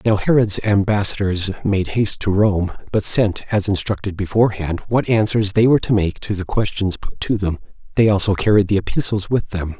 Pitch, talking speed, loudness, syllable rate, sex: 100 Hz, 190 wpm, -18 LUFS, 5.4 syllables/s, male